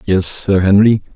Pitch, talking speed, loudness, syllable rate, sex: 100 Hz, 155 wpm, -13 LUFS, 4.1 syllables/s, male